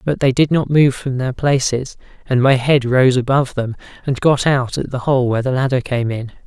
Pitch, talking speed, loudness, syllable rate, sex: 130 Hz, 230 wpm, -16 LUFS, 5.3 syllables/s, male